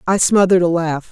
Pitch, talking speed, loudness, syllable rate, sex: 175 Hz, 215 wpm, -14 LUFS, 6.2 syllables/s, female